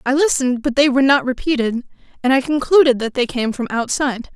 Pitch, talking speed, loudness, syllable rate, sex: 260 Hz, 205 wpm, -17 LUFS, 6.3 syllables/s, female